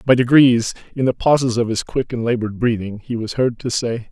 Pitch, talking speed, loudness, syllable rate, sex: 120 Hz, 235 wpm, -18 LUFS, 5.6 syllables/s, male